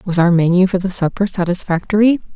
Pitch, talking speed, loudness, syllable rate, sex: 185 Hz, 180 wpm, -15 LUFS, 6.2 syllables/s, female